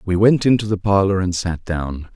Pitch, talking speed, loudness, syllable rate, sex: 95 Hz, 220 wpm, -18 LUFS, 5.0 syllables/s, male